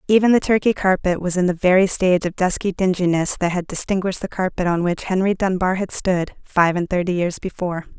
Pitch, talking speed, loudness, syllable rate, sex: 185 Hz, 210 wpm, -19 LUFS, 5.9 syllables/s, female